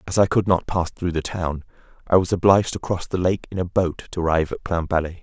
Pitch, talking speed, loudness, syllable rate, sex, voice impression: 90 Hz, 255 wpm, -22 LUFS, 6.2 syllables/s, male, very masculine, adult-like, slightly thick, cool, slightly intellectual